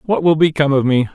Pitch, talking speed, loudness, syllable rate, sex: 150 Hz, 265 wpm, -15 LUFS, 6.5 syllables/s, male